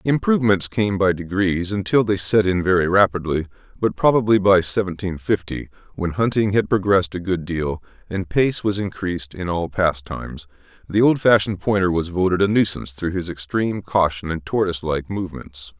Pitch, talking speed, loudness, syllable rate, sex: 95 Hz, 165 wpm, -20 LUFS, 5.4 syllables/s, male